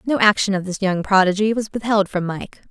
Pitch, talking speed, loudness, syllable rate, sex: 200 Hz, 220 wpm, -19 LUFS, 5.7 syllables/s, female